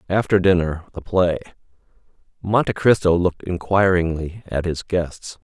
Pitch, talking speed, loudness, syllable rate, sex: 90 Hz, 120 wpm, -20 LUFS, 4.7 syllables/s, male